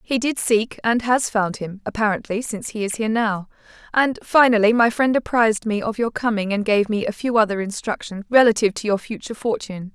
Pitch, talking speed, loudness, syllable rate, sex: 220 Hz, 205 wpm, -20 LUFS, 5.8 syllables/s, female